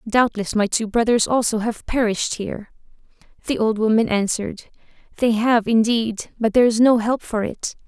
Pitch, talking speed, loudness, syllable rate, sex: 225 Hz, 160 wpm, -20 LUFS, 5.3 syllables/s, female